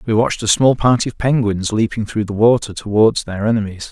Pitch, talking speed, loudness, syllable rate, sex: 110 Hz, 215 wpm, -16 LUFS, 5.8 syllables/s, male